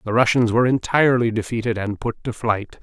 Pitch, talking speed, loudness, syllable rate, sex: 115 Hz, 190 wpm, -20 LUFS, 5.9 syllables/s, male